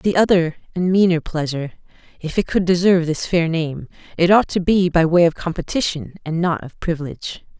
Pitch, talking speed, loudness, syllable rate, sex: 170 Hz, 190 wpm, -18 LUFS, 5.6 syllables/s, female